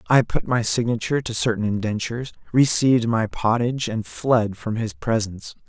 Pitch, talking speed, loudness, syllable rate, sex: 115 Hz, 160 wpm, -22 LUFS, 5.4 syllables/s, male